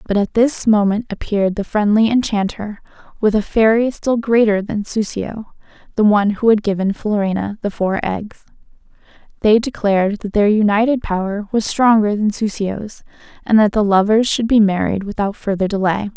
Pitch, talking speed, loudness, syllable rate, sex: 210 Hz, 165 wpm, -16 LUFS, 5.1 syllables/s, female